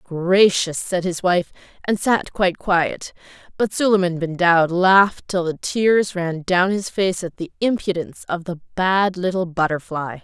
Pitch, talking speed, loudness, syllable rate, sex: 180 Hz, 165 wpm, -19 LUFS, 4.3 syllables/s, female